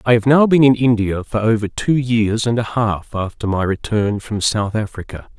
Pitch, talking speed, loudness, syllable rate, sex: 110 Hz, 210 wpm, -17 LUFS, 4.8 syllables/s, male